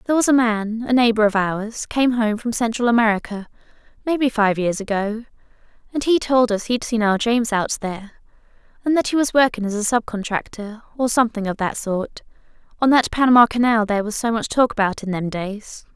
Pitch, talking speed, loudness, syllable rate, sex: 225 Hz, 205 wpm, -19 LUFS, 5.6 syllables/s, female